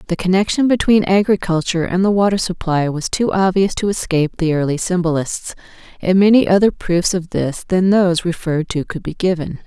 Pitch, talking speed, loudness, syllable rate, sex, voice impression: 180 Hz, 180 wpm, -16 LUFS, 5.6 syllables/s, female, feminine, adult-like, slightly intellectual, calm, slightly reassuring, elegant, slightly sweet